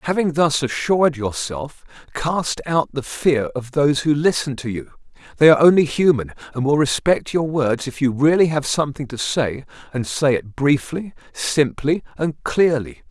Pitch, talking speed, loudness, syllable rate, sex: 140 Hz, 165 wpm, -19 LUFS, 4.8 syllables/s, male